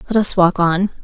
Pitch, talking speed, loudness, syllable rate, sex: 185 Hz, 230 wpm, -15 LUFS, 5.4 syllables/s, female